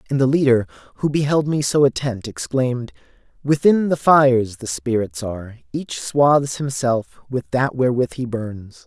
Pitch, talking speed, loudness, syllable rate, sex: 130 Hz, 155 wpm, -19 LUFS, 4.9 syllables/s, male